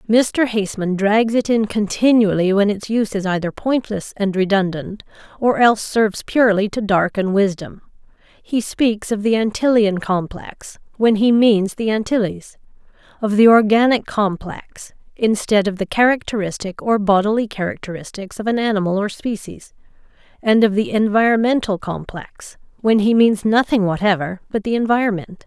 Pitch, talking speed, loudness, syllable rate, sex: 210 Hz, 145 wpm, -17 LUFS, 4.9 syllables/s, female